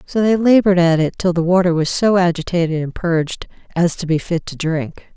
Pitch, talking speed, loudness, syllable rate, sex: 175 Hz, 220 wpm, -17 LUFS, 5.5 syllables/s, female